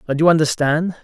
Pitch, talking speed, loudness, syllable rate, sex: 155 Hz, 175 wpm, -16 LUFS, 6.1 syllables/s, male